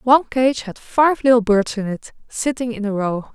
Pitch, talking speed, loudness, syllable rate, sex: 235 Hz, 215 wpm, -18 LUFS, 4.7 syllables/s, female